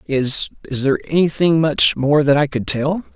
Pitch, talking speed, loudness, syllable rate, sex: 140 Hz, 170 wpm, -16 LUFS, 4.6 syllables/s, male